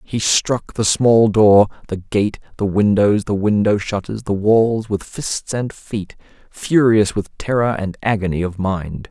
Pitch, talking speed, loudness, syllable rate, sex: 105 Hz, 165 wpm, -17 LUFS, 3.9 syllables/s, male